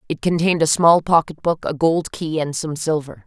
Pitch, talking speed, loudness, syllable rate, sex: 160 Hz, 220 wpm, -19 LUFS, 5.3 syllables/s, female